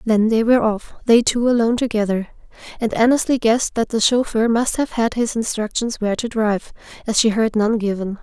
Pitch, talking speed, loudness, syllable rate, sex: 225 Hz, 195 wpm, -18 LUFS, 5.7 syllables/s, female